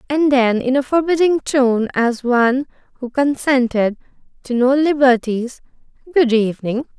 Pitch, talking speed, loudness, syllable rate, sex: 260 Hz, 130 wpm, -17 LUFS, 4.5 syllables/s, female